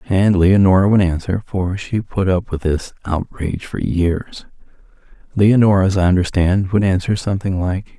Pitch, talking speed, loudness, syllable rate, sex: 95 Hz, 145 wpm, -17 LUFS, 4.9 syllables/s, male